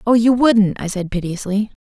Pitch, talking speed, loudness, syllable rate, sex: 210 Hz, 195 wpm, -17 LUFS, 5.0 syllables/s, female